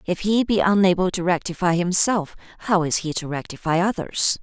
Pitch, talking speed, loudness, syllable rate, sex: 180 Hz, 175 wpm, -21 LUFS, 5.3 syllables/s, female